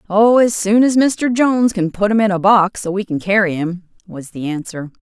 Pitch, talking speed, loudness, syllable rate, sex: 200 Hz, 240 wpm, -15 LUFS, 5.0 syllables/s, female